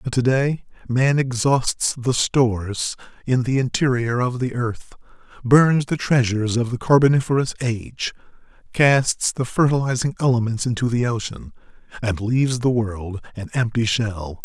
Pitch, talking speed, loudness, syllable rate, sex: 120 Hz, 140 wpm, -20 LUFS, 4.5 syllables/s, male